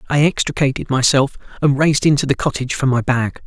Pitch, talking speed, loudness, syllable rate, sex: 135 Hz, 190 wpm, -17 LUFS, 6.3 syllables/s, male